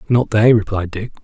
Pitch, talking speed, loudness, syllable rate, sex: 110 Hz, 195 wpm, -16 LUFS, 5.2 syllables/s, male